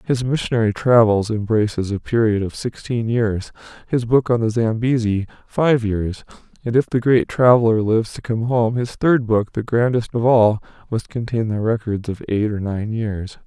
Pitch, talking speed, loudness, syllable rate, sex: 115 Hz, 185 wpm, -19 LUFS, 4.8 syllables/s, male